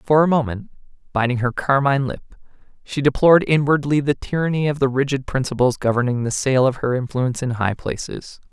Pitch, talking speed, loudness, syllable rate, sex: 135 Hz, 175 wpm, -19 LUFS, 5.8 syllables/s, male